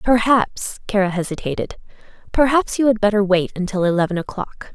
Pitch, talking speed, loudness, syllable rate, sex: 205 Hz, 140 wpm, -19 LUFS, 5.5 syllables/s, female